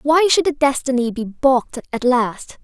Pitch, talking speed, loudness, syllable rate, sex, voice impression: 265 Hz, 180 wpm, -18 LUFS, 4.5 syllables/s, female, feminine, slightly young, cute, friendly, slightly kind